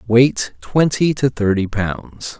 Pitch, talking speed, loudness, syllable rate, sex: 115 Hz, 125 wpm, -18 LUFS, 3.2 syllables/s, male